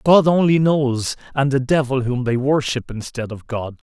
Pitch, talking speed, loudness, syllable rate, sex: 130 Hz, 185 wpm, -19 LUFS, 4.5 syllables/s, male